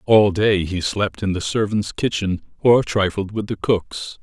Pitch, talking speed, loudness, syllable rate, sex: 100 Hz, 185 wpm, -20 LUFS, 4.1 syllables/s, male